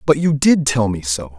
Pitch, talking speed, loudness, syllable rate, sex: 125 Hz, 260 wpm, -16 LUFS, 4.7 syllables/s, male